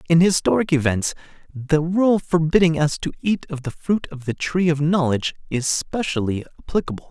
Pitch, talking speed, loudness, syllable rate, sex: 160 Hz, 170 wpm, -21 LUFS, 5.2 syllables/s, male